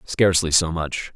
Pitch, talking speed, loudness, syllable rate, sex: 85 Hz, 155 wpm, -20 LUFS, 4.8 syllables/s, male